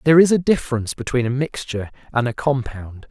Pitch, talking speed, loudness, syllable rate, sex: 130 Hz, 195 wpm, -20 LUFS, 6.5 syllables/s, male